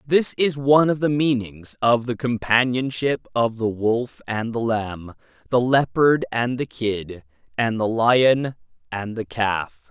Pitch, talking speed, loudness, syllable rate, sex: 120 Hz, 155 wpm, -21 LUFS, 3.8 syllables/s, male